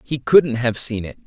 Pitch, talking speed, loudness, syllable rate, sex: 120 Hz, 235 wpm, -17 LUFS, 4.5 syllables/s, male